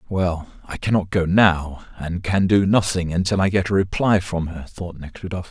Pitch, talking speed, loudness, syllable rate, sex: 90 Hz, 195 wpm, -20 LUFS, 4.8 syllables/s, male